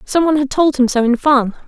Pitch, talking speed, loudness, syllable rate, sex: 270 Hz, 285 wpm, -14 LUFS, 6.1 syllables/s, female